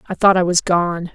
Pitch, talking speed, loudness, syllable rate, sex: 175 Hz, 265 wpm, -16 LUFS, 5.2 syllables/s, female